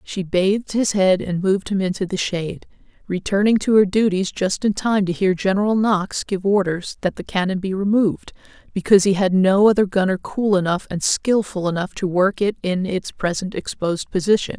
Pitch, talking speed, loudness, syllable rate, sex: 190 Hz, 195 wpm, -19 LUFS, 5.3 syllables/s, female